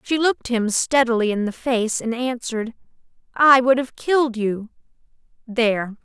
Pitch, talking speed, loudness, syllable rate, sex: 240 Hz, 150 wpm, -20 LUFS, 4.8 syllables/s, female